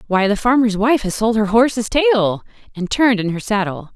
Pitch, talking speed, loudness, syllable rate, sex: 215 Hz, 215 wpm, -16 LUFS, 5.9 syllables/s, female